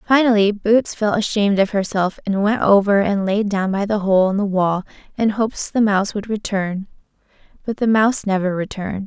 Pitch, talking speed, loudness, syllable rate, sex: 205 Hz, 190 wpm, -18 LUFS, 5.4 syllables/s, female